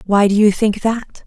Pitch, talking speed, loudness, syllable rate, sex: 210 Hz, 235 wpm, -15 LUFS, 4.4 syllables/s, female